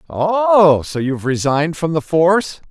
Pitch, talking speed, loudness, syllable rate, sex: 165 Hz, 155 wpm, -15 LUFS, 4.5 syllables/s, male